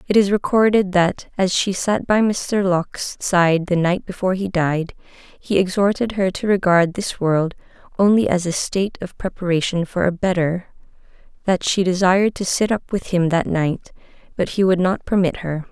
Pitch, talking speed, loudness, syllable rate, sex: 185 Hz, 185 wpm, -19 LUFS, 4.9 syllables/s, female